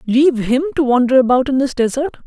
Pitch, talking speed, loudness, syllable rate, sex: 265 Hz, 210 wpm, -15 LUFS, 6.2 syllables/s, female